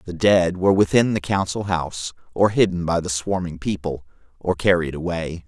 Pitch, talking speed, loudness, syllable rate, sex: 90 Hz, 175 wpm, -21 LUFS, 5.2 syllables/s, male